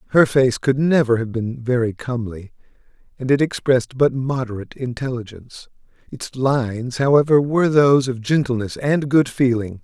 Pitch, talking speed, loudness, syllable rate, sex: 130 Hz, 145 wpm, -19 LUFS, 5.3 syllables/s, male